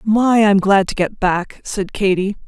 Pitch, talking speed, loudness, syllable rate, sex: 200 Hz, 195 wpm, -16 LUFS, 4.0 syllables/s, female